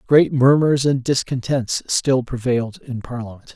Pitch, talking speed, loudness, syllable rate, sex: 130 Hz, 135 wpm, -19 LUFS, 4.6 syllables/s, male